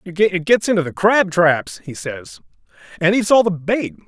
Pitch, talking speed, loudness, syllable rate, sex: 180 Hz, 190 wpm, -17 LUFS, 4.3 syllables/s, male